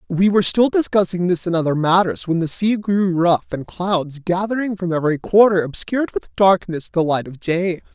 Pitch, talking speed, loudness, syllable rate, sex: 180 Hz, 195 wpm, -18 LUFS, 5.2 syllables/s, male